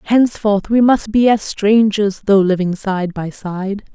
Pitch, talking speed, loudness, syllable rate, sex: 205 Hz, 165 wpm, -15 LUFS, 4.1 syllables/s, female